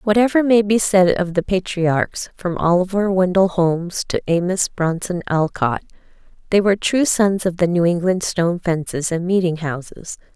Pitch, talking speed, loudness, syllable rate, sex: 180 Hz, 160 wpm, -18 LUFS, 4.7 syllables/s, female